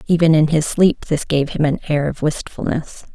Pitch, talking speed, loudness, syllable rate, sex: 155 Hz, 210 wpm, -18 LUFS, 5.0 syllables/s, female